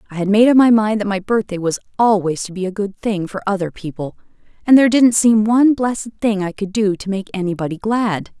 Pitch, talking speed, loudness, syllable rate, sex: 205 Hz, 235 wpm, -17 LUFS, 5.8 syllables/s, female